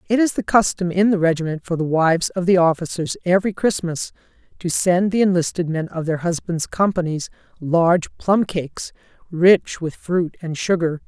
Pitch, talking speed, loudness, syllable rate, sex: 175 Hz, 175 wpm, -19 LUFS, 5.1 syllables/s, female